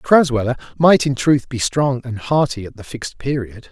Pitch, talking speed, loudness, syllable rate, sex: 130 Hz, 195 wpm, -18 LUFS, 5.0 syllables/s, male